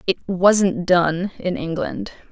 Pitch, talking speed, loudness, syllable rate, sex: 185 Hz, 155 wpm, -19 LUFS, 3.6 syllables/s, female